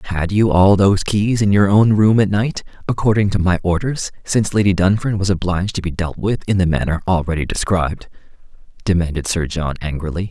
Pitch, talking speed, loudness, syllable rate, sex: 95 Hz, 190 wpm, -17 LUFS, 5.8 syllables/s, male